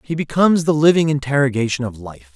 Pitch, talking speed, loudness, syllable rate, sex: 140 Hz, 180 wpm, -17 LUFS, 6.2 syllables/s, male